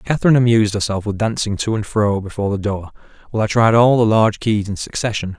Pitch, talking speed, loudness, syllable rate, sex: 110 Hz, 225 wpm, -17 LUFS, 6.7 syllables/s, male